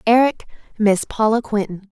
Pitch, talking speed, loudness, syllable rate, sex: 215 Hz, 125 wpm, -18 LUFS, 4.8 syllables/s, female